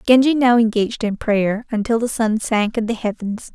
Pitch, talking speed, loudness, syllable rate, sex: 230 Hz, 205 wpm, -18 LUFS, 5.1 syllables/s, female